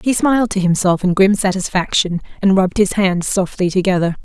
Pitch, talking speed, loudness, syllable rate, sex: 190 Hz, 185 wpm, -16 LUFS, 5.6 syllables/s, female